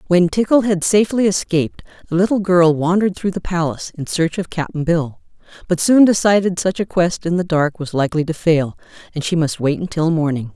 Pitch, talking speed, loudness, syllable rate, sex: 170 Hz, 205 wpm, -17 LUFS, 5.6 syllables/s, female